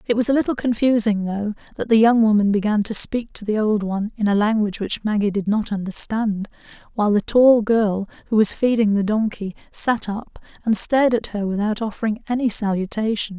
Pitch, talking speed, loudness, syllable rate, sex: 215 Hz, 195 wpm, -20 LUFS, 5.6 syllables/s, female